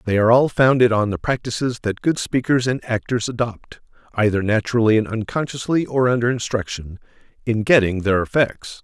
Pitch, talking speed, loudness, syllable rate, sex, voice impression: 115 Hz, 150 wpm, -19 LUFS, 5.5 syllables/s, male, masculine, adult-like, slightly thick, cool, slightly intellectual, slightly calm, slightly friendly